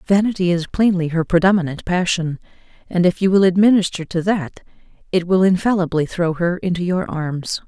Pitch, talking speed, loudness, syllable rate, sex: 180 Hz, 165 wpm, -18 LUFS, 5.4 syllables/s, female